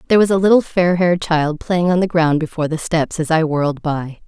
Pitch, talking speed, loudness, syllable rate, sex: 165 Hz, 255 wpm, -17 LUFS, 5.9 syllables/s, female